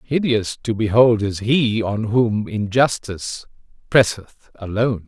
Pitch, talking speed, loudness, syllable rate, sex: 110 Hz, 120 wpm, -19 LUFS, 4.0 syllables/s, male